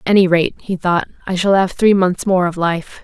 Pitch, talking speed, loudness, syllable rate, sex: 185 Hz, 255 wpm, -16 LUFS, 5.2 syllables/s, female